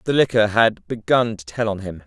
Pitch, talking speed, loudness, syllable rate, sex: 110 Hz, 230 wpm, -19 LUFS, 5.2 syllables/s, male